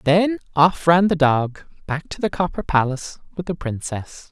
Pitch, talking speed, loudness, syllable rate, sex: 155 Hz, 180 wpm, -20 LUFS, 4.7 syllables/s, male